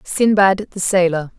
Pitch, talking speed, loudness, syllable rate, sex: 190 Hz, 130 wpm, -16 LUFS, 4.2 syllables/s, female